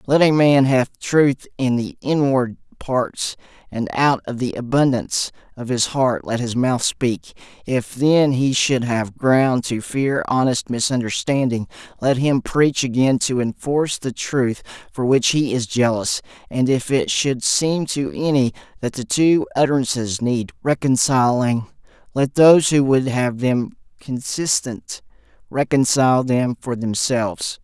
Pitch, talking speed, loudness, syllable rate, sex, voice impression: 130 Hz, 150 wpm, -19 LUFS, 4.1 syllables/s, male, masculine, adult-like, tensed, powerful, slightly hard, slightly nasal, slightly intellectual, calm, friendly, wild, lively